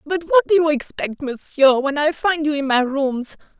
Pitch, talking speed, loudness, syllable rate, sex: 295 Hz, 215 wpm, -19 LUFS, 4.6 syllables/s, female